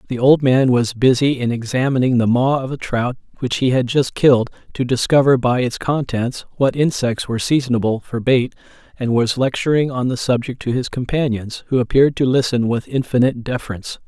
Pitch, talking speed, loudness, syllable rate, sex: 125 Hz, 190 wpm, -18 LUFS, 5.6 syllables/s, male